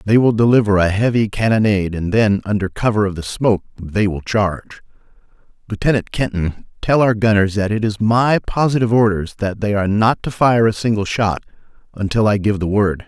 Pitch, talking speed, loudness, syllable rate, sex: 105 Hz, 190 wpm, -17 LUFS, 5.6 syllables/s, male